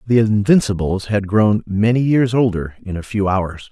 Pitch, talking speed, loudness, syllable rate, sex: 105 Hz, 180 wpm, -17 LUFS, 4.6 syllables/s, male